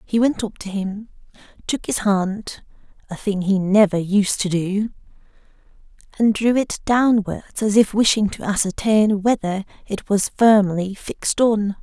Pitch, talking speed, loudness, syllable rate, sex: 205 Hz, 150 wpm, -19 LUFS, 3.6 syllables/s, female